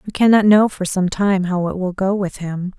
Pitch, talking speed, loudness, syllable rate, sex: 190 Hz, 260 wpm, -17 LUFS, 4.9 syllables/s, female